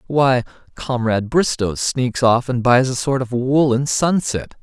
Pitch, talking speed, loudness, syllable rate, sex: 125 Hz, 155 wpm, -18 LUFS, 4.1 syllables/s, male